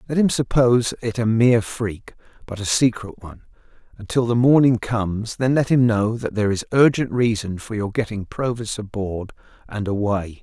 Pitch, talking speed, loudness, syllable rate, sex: 115 Hz, 180 wpm, -20 LUFS, 5.2 syllables/s, male